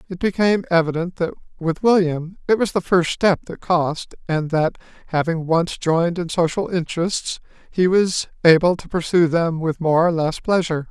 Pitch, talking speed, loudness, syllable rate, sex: 170 Hz, 175 wpm, -20 LUFS, 4.9 syllables/s, male